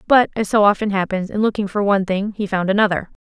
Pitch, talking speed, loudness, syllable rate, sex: 200 Hz, 240 wpm, -18 LUFS, 6.5 syllables/s, female